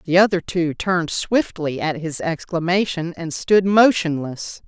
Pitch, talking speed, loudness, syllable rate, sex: 170 Hz, 140 wpm, -20 LUFS, 4.2 syllables/s, female